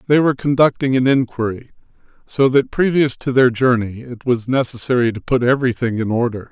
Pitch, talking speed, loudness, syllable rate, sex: 125 Hz, 175 wpm, -17 LUFS, 5.7 syllables/s, male